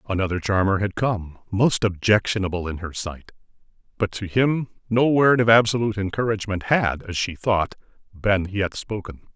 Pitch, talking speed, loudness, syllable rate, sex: 100 Hz, 155 wpm, -22 LUFS, 5.1 syllables/s, male